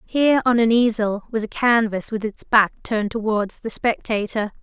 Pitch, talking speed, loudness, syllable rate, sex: 220 Hz, 180 wpm, -20 LUFS, 4.8 syllables/s, female